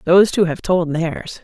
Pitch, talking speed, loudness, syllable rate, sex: 170 Hz, 210 wpm, -17 LUFS, 4.6 syllables/s, female